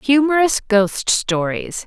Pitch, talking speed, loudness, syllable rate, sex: 240 Hz, 95 wpm, -17 LUFS, 3.3 syllables/s, female